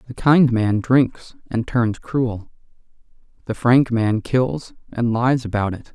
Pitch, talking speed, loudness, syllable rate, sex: 120 Hz, 150 wpm, -19 LUFS, 3.5 syllables/s, male